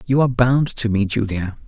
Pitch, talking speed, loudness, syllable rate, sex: 115 Hz, 215 wpm, -19 LUFS, 5.4 syllables/s, male